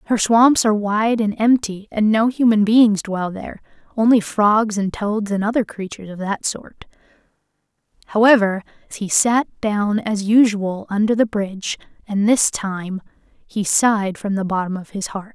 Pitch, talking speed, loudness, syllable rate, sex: 210 Hz, 165 wpm, -18 LUFS, 4.5 syllables/s, female